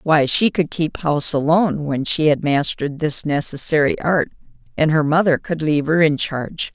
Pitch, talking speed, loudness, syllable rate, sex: 155 Hz, 185 wpm, -18 LUFS, 5.2 syllables/s, female